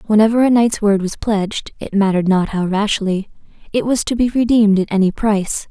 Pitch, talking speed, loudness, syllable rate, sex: 210 Hz, 200 wpm, -16 LUFS, 4.8 syllables/s, female